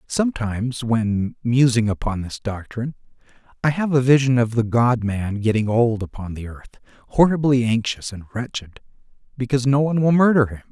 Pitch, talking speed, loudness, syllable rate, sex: 120 Hz, 160 wpm, -20 LUFS, 5.5 syllables/s, male